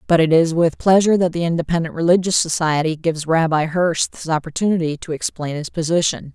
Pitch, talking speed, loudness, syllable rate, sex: 165 Hz, 180 wpm, -18 LUFS, 6.0 syllables/s, female